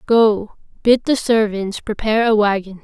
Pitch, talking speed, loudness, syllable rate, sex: 215 Hz, 150 wpm, -17 LUFS, 4.7 syllables/s, female